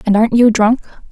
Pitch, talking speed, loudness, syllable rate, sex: 225 Hz, 215 wpm, -13 LUFS, 7.1 syllables/s, female